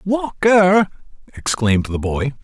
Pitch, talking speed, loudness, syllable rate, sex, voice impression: 150 Hz, 125 wpm, -17 LUFS, 4.0 syllables/s, male, very masculine, very adult-like, middle-aged, very thick, tensed, very soft, slightly muffled, fluent, slightly raspy, very cool, very intellectual, sincere, calm, very mature, friendly, reassuring, very wild, slightly sweet, lively, kind, slightly modest